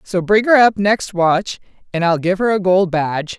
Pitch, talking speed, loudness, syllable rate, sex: 190 Hz, 230 wpm, -15 LUFS, 4.7 syllables/s, female